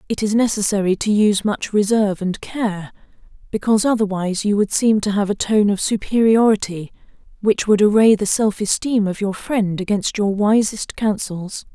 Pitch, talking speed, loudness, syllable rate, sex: 205 Hz, 170 wpm, -18 LUFS, 5.1 syllables/s, female